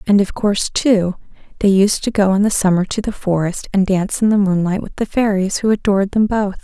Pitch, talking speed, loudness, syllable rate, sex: 200 Hz, 235 wpm, -16 LUFS, 5.7 syllables/s, female